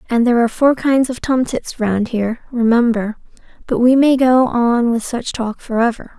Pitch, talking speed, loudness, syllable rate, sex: 240 Hz, 195 wpm, -16 LUFS, 5.0 syllables/s, female